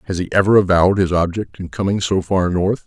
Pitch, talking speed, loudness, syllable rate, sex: 95 Hz, 230 wpm, -17 LUFS, 6.0 syllables/s, male